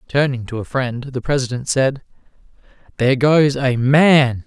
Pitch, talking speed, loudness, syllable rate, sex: 130 Hz, 150 wpm, -17 LUFS, 4.5 syllables/s, male